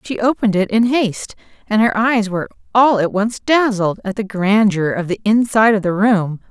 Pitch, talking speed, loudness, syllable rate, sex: 210 Hz, 205 wpm, -16 LUFS, 5.3 syllables/s, female